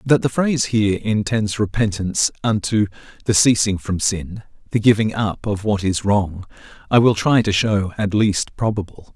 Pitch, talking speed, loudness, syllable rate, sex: 105 Hz, 170 wpm, -19 LUFS, 4.8 syllables/s, male